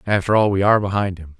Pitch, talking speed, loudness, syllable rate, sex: 100 Hz, 260 wpm, -18 LUFS, 7.3 syllables/s, male